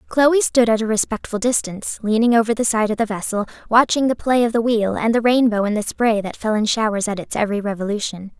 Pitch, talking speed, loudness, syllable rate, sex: 220 Hz, 235 wpm, -19 LUFS, 6.1 syllables/s, female